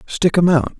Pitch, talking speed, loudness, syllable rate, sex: 165 Hz, 225 wpm, -15 LUFS, 4.6 syllables/s, male